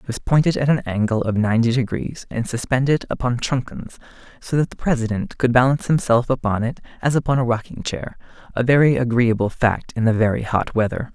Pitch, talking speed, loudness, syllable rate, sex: 120 Hz, 195 wpm, -20 LUFS, 5.8 syllables/s, male